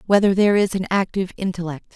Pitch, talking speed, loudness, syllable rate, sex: 190 Hz, 185 wpm, -20 LUFS, 7.2 syllables/s, female